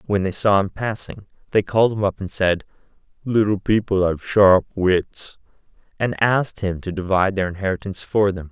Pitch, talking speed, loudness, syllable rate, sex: 100 Hz, 175 wpm, -20 LUFS, 5.3 syllables/s, male